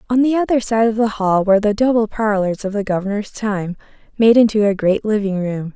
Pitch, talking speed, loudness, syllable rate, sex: 210 Hz, 220 wpm, -17 LUFS, 5.6 syllables/s, female